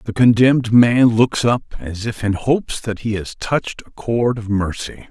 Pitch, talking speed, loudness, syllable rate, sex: 115 Hz, 200 wpm, -17 LUFS, 4.6 syllables/s, male